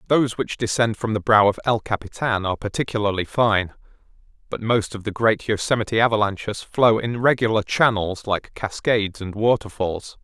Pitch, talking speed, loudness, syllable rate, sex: 110 Hz, 160 wpm, -21 LUFS, 5.3 syllables/s, male